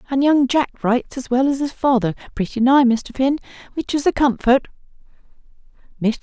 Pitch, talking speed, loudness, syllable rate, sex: 260 Hz, 165 wpm, -19 LUFS, 5.5 syllables/s, female